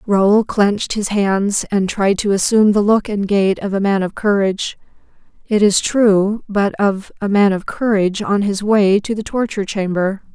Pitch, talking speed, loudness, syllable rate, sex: 200 Hz, 190 wpm, -16 LUFS, 4.6 syllables/s, female